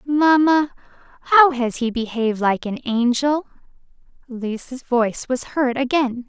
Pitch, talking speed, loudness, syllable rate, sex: 255 Hz, 125 wpm, -19 LUFS, 4.2 syllables/s, female